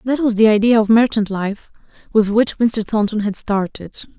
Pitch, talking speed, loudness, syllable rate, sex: 215 Hz, 185 wpm, -16 LUFS, 4.9 syllables/s, female